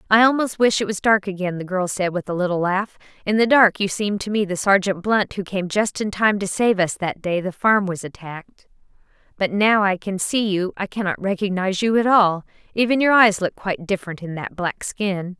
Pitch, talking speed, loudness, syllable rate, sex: 195 Hz, 235 wpm, -20 LUFS, 5.3 syllables/s, female